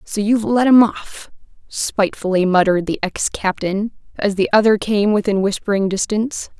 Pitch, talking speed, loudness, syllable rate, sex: 205 Hz, 145 wpm, -17 LUFS, 5.2 syllables/s, female